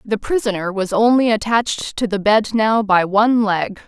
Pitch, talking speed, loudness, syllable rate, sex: 215 Hz, 185 wpm, -17 LUFS, 4.8 syllables/s, female